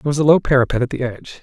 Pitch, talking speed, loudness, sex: 135 Hz, 340 wpm, -17 LUFS, male